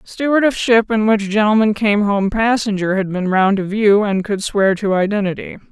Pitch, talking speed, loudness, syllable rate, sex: 205 Hz, 200 wpm, -16 LUFS, 4.9 syllables/s, female